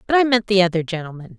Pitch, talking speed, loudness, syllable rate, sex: 195 Hz, 260 wpm, -18 LUFS, 7.2 syllables/s, female